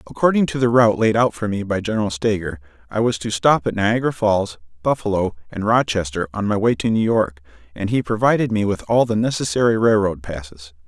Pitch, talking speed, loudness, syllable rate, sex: 105 Hz, 205 wpm, -19 LUFS, 5.8 syllables/s, male